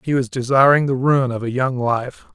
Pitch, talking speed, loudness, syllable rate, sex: 130 Hz, 230 wpm, -18 LUFS, 5.1 syllables/s, male